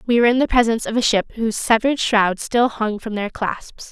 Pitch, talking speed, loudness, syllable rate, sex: 225 Hz, 245 wpm, -19 LUFS, 5.9 syllables/s, female